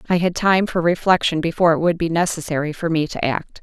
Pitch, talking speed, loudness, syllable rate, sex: 170 Hz, 230 wpm, -19 LUFS, 6.1 syllables/s, female